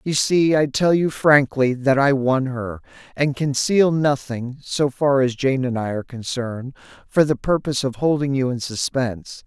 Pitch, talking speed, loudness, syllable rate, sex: 135 Hz, 185 wpm, -20 LUFS, 4.6 syllables/s, male